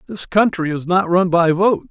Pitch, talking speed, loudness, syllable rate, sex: 180 Hz, 220 wpm, -16 LUFS, 5.3 syllables/s, male